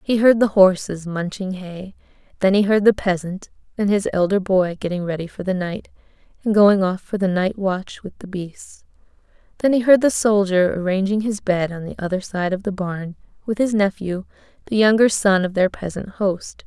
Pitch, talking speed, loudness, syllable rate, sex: 195 Hz, 200 wpm, -19 LUFS, 5.0 syllables/s, female